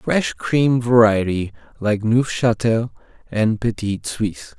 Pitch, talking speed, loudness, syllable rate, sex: 110 Hz, 105 wpm, -19 LUFS, 3.6 syllables/s, male